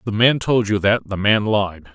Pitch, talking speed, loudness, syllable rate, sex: 105 Hz, 280 wpm, -18 LUFS, 4.8 syllables/s, male